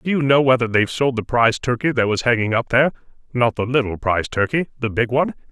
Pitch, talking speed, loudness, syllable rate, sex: 120 Hz, 230 wpm, -19 LUFS, 6.7 syllables/s, male